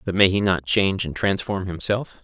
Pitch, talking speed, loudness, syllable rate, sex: 95 Hz, 215 wpm, -22 LUFS, 5.2 syllables/s, male